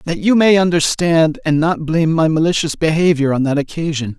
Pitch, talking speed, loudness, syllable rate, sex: 160 Hz, 185 wpm, -15 LUFS, 5.5 syllables/s, male